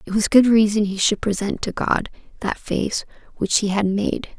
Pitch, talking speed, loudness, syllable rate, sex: 205 Hz, 205 wpm, -20 LUFS, 4.7 syllables/s, female